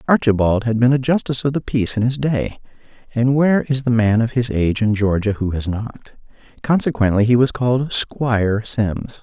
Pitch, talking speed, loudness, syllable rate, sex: 120 Hz, 195 wpm, -18 LUFS, 3.9 syllables/s, male